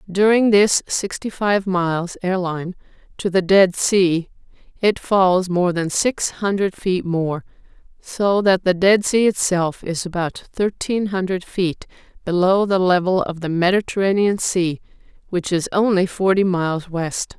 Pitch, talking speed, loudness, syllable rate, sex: 185 Hz, 145 wpm, -19 LUFS, 4.1 syllables/s, female